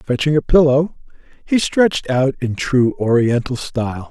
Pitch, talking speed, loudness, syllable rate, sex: 135 Hz, 145 wpm, -17 LUFS, 4.5 syllables/s, male